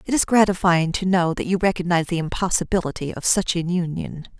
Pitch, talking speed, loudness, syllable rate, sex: 175 Hz, 190 wpm, -21 LUFS, 5.9 syllables/s, female